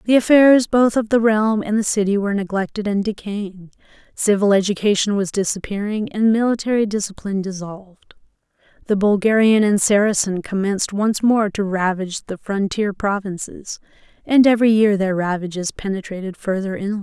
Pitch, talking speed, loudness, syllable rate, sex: 205 Hz, 145 wpm, -18 LUFS, 5.4 syllables/s, female